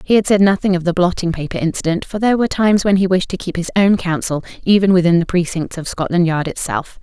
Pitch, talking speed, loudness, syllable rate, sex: 185 Hz, 250 wpm, -16 LUFS, 6.5 syllables/s, female